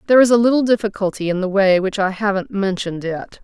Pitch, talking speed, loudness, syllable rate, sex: 200 Hz, 225 wpm, -17 LUFS, 6.5 syllables/s, female